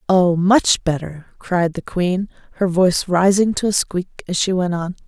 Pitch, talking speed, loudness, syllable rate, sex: 180 Hz, 190 wpm, -18 LUFS, 4.4 syllables/s, female